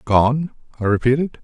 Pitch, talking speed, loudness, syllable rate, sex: 130 Hz, 125 wpm, -19 LUFS, 4.7 syllables/s, male